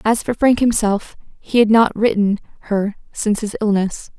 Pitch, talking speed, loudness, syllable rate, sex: 215 Hz, 160 wpm, -17 LUFS, 4.8 syllables/s, female